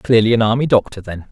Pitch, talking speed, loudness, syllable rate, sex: 110 Hz, 230 wpm, -15 LUFS, 6.4 syllables/s, male